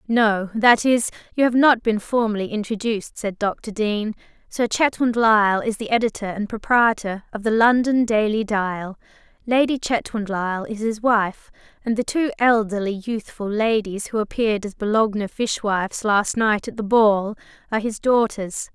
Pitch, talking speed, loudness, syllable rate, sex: 220 Hz, 155 wpm, -21 LUFS, 4.7 syllables/s, female